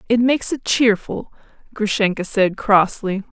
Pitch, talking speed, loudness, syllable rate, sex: 210 Hz, 125 wpm, -18 LUFS, 4.5 syllables/s, female